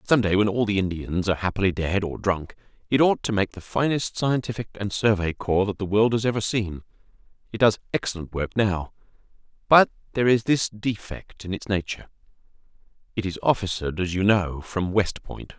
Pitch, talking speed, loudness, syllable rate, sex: 100 Hz, 190 wpm, -24 LUFS, 5.6 syllables/s, male